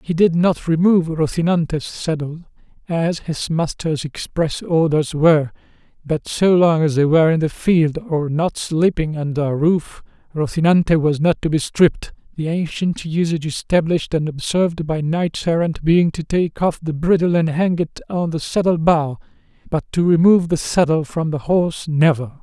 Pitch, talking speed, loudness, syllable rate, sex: 160 Hz, 165 wpm, -18 LUFS, 4.8 syllables/s, male